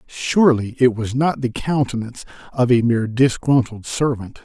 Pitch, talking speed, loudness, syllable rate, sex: 125 Hz, 150 wpm, -18 LUFS, 5.0 syllables/s, male